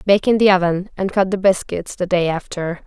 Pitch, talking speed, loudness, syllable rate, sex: 185 Hz, 230 wpm, -18 LUFS, 5.2 syllables/s, female